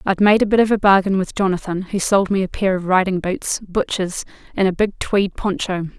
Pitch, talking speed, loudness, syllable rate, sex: 190 Hz, 230 wpm, -18 LUFS, 5.4 syllables/s, female